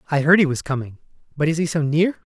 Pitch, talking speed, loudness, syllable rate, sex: 155 Hz, 260 wpm, -20 LUFS, 6.7 syllables/s, male